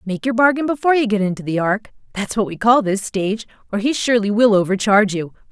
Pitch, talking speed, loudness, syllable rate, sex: 215 Hz, 205 wpm, -18 LUFS, 6.5 syllables/s, female